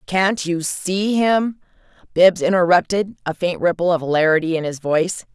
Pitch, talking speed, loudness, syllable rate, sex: 180 Hz, 155 wpm, -18 LUFS, 4.8 syllables/s, female